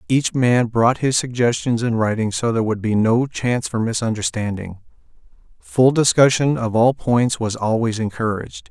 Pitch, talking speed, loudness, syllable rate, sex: 115 Hz, 160 wpm, -19 LUFS, 4.9 syllables/s, male